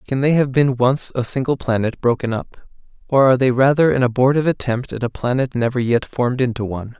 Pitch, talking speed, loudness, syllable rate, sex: 125 Hz, 215 wpm, -18 LUFS, 6.1 syllables/s, male